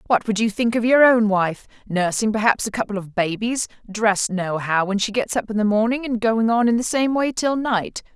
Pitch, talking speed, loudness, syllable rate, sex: 220 Hz, 235 wpm, -20 LUFS, 5.2 syllables/s, female